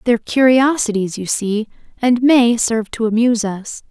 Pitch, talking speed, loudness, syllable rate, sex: 230 Hz, 155 wpm, -16 LUFS, 5.0 syllables/s, female